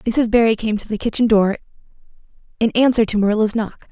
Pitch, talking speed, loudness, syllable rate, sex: 220 Hz, 185 wpm, -17 LUFS, 6.3 syllables/s, female